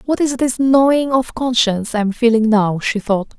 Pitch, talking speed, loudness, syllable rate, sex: 235 Hz, 215 wpm, -16 LUFS, 5.1 syllables/s, female